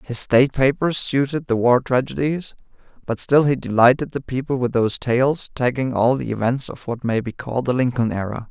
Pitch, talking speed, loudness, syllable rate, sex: 125 Hz, 200 wpm, -20 LUFS, 5.4 syllables/s, male